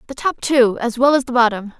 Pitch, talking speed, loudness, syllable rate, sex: 245 Hz, 270 wpm, -16 LUFS, 5.8 syllables/s, female